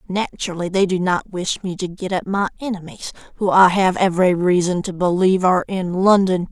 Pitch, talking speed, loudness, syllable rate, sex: 185 Hz, 195 wpm, -18 LUFS, 5.6 syllables/s, female